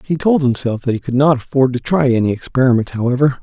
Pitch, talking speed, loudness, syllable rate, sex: 130 Hz, 230 wpm, -16 LUFS, 6.4 syllables/s, male